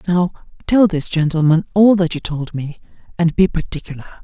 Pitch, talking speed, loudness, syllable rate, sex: 170 Hz, 170 wpm, -17 LUFS, 5.5 syllables/s, male